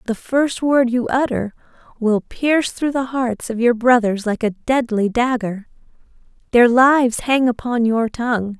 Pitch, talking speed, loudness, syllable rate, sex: 240 Hz, 160 wpm, -18 LUFS, 4.4 syllables/s, female